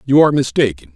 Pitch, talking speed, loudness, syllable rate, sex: 130 Hz, 190 wpm, -15 LUFS, 7.1 syllables/s, male